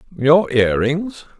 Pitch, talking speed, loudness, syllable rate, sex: 155 Hz, 130 wpm, -16 LUFS, 3.3 syllables/s, male